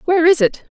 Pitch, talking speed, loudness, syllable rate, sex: 315 Hz, 240 wpm, -15 LUFS, 6.8 syllables/s, female